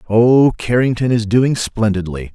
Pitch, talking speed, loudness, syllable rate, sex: 115 Hz, 130 wpm, -15 LUFS, 4.2 syllables/s, male